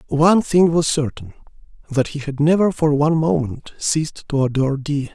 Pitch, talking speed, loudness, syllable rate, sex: 150 Hz, 175 wpm, -18 LUFS, 5.4 syllables/s, male